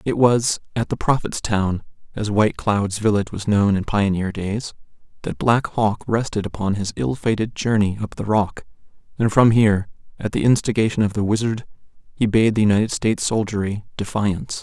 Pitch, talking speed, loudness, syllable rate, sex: 105 Hz, 175 wpm, -20 LUFS, 5.3 syllables/s, male